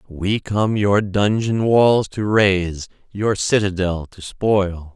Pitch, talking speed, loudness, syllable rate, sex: 100 Hz, 135 wpm, -18 LUFS, 3.1 syllables/s, male